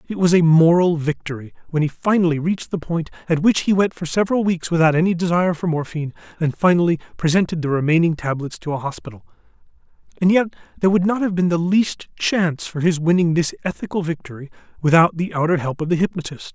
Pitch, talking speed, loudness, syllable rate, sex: 170 Hz, 200 wpm, -19 LUFS, 6.5 syllables/s, male